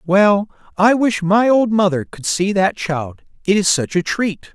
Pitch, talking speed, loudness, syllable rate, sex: 195 Hz, 200 wpm, -16 LUFS, 4.0 syllables/s, male